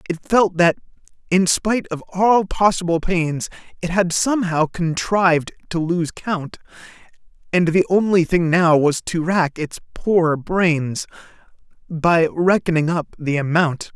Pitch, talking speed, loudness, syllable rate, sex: 170 Hz, 140 wpm, -19 LUFS, 4.0 syllables/s, male